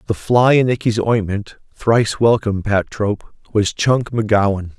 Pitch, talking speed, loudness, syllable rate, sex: 110 Hz, 150 wpm, -17 LUFS, 3.9 syllables/s, male